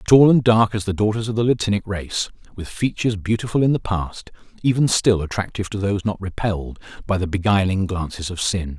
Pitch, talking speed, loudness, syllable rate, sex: 100 Hz, 190 wpm, -20 LUFS, 5.9 syllables/s, male